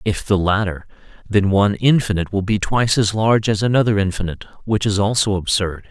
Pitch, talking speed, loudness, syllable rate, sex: 105 Hz, 185 wpm, -18 LUFS, 6.1 syllables/s, male